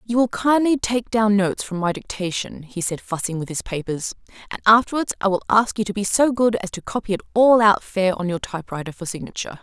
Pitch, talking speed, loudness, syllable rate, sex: 205 Hz, 230 wpm, -21 LUFS, 6.0 syllables/s, female